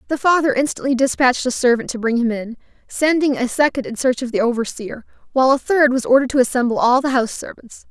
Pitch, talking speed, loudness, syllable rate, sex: 255 Hz, 220 wpm, -17 LUFS, 6.5 syllables/s, female